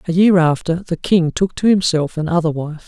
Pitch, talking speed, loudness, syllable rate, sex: 170 Hz, 210 wpm, -16 LUFS, 5.2 syllables/s, male